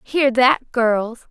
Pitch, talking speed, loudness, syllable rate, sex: 245 Hz, 140 wpm, -17 LUFS, 2.7 syllables/s, female